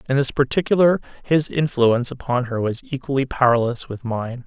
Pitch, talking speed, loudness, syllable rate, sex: 130 Hz, 160 wpm, -20 LUFS, 5.6 syllables/s, male